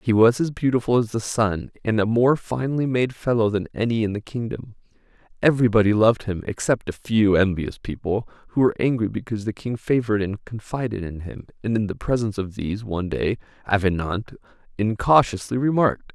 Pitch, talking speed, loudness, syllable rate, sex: 110 Hz, 180 wpm, -22 LUFS, 5.9 syllables/s, male